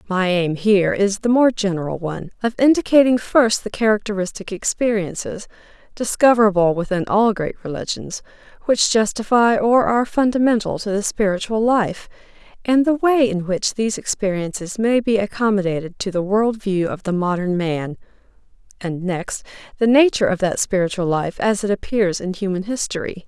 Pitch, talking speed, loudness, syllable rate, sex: 205 Hz, 150 wpm, -19 LUFS, 5.2 syllables/s, female